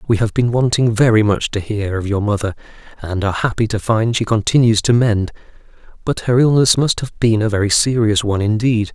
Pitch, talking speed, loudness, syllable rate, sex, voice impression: 110 Hz, 210 wpm, -16 LUFS, 5.7 syllables/s, male, masculine, very adult-like, slightly thick, cool, slightly intellectual, calm